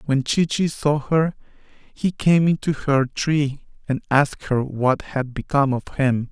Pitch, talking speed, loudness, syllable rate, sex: 140 Hz, 170 wpm, -21 LUFS, 4.1 syllables/s, male